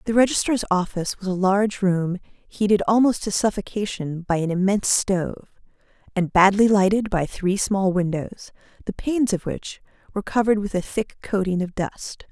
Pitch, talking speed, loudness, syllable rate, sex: 195 Hz, 165 wpm, -22 LUFS, 5.2 syllables/s, female